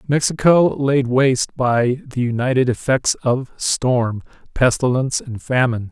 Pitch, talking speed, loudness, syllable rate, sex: 130 Hz, 120 wpm, -18 LUFS, 4.4 syllables/s, male